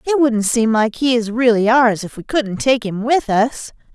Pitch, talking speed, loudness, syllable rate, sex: 235 Hz, 230 wpm, -16 LUFS, 4.5 syllables/s, female